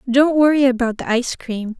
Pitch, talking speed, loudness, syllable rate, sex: 255 Hz, 200 wpm, -17 LUFS, 5.5 syllables/s, female